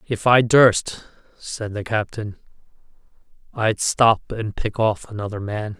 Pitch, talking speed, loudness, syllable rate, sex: 110 Hz, 135 wpm, -20 LUFS, 3.8 syllables/s, male